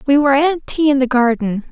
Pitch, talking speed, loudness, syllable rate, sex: 270 Hz, 245 wpm, -15 LUFS, 5.8 syllables/s, female